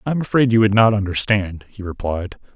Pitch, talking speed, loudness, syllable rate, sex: 105 Hz, 210 wpm, -18 LUFS, 5.8 syllables/s, male